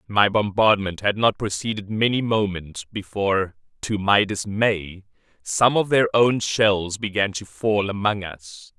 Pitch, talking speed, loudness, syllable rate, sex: 100 Hz, 145 wpm, -21 LUFS, 4.1 syllables/s, male